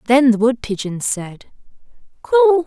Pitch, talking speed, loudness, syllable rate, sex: 260 Hz, 135 wpm, -17 LUFS, 3.9 syllables/s, female